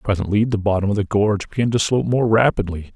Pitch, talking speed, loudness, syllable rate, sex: 105 Hz, 225 wpm, -19 LUFS, 6.7 syllables/s, male